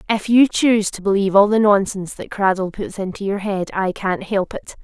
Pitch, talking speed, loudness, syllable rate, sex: 200 Hz, 225 wpm, -18 LUFS, 5.5 syllables/s, female